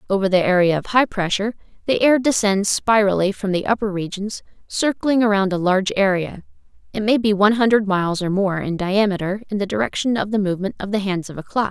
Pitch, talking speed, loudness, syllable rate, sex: 200 Hz, 200 wpm, -19 LUFS, 6.1 syllables/s, female